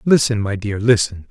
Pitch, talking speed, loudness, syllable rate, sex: 110 Hz, 185 wpm, -17 LUFS, 5.0 syllables/s, male